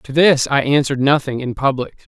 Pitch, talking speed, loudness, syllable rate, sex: 135 Hz, 195 wpm, -16 LUFS, 5.8 syllables/s, male